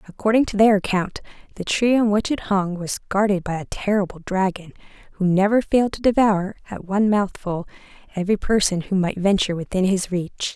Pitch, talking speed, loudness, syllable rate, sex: 195 Hz, 180 wpm, -21 LUFS, 5.7 syllables/s, female